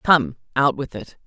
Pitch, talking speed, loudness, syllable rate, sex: 140 Hz, 190 wpm, -21 LUFS, 4.4 syllables/s, female